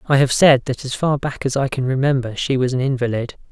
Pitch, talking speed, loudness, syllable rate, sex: 130 Hz, 255 wpm, -18 LUFS, 5.8 syllables/s, male